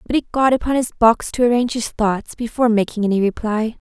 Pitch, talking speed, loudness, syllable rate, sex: 230 Hz, 215 wpm, -18 LUFS, 6.0 syllables/s, female